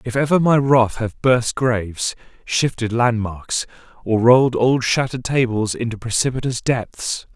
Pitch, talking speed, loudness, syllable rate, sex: 120 Hz, 140 wpm, -19 LUFS, 4.4 syllables/s, male